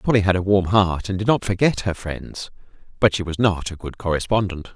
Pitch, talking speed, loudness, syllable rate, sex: 95 Hz, 225 wpm, -21 LUFS, 5.5 syllables/s, male